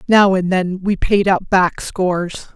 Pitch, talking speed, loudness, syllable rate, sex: 185 Hz, 190 wpm, -16 LUFS, 3.9 syllables/s, female